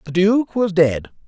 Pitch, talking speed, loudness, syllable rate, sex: 185 Hz, 190 wpm, -17 LUFS, 4.0 syllables/s, male